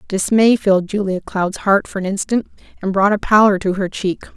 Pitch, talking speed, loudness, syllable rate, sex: 195 Hz, 205 wpm, -17 LUFS, 5.4 syllables/s, female